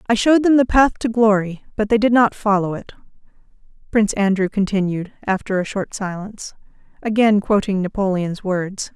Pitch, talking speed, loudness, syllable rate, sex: 205 Hz, 160 wpm, -18 LUFS, 5.4 syllables/s, female